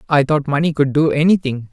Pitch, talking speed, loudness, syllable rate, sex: 145 Hz, 210 wpm, -16 LUFS, 5.9 syllables/s, male